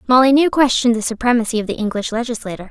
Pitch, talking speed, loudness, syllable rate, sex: 235 Hz, 175 wpm, -16 LUFS, 7.8 syllables/s, female